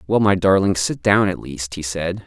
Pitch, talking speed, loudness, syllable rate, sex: 95 Hz, 240 wpm, -19 LUFS, 4.8 syllables/s, male